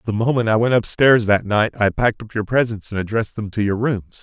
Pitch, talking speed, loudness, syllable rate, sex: 110 Hz, 255 wpm, -19 LUFS, 5.9 syllables/s, male